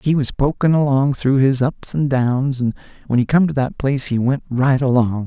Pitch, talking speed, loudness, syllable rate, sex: 135 Hz, 230 wpm, -18 LUFS, 5.0 syllables/s, male